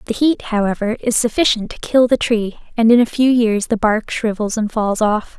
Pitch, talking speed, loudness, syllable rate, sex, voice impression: 225 Hz, 225 wpm, -16 LUFS, 5.0 syllables/s, female, very feminine, young, slightly adult-like, very thin, tensed, slightly powerful, very bright, hard, clear, fluent, very cute, intellectual, refreshing, slightly sincere, slightly calm, very friendly, reassuring, slightly wild, very sweet, lively, kind, slightly intense, slightly sharp